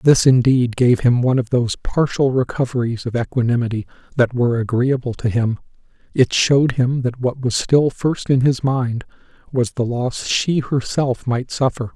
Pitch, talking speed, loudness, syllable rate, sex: 125 Hz, 165 wpm, -18 LUFS, 4.8 syllables/s, male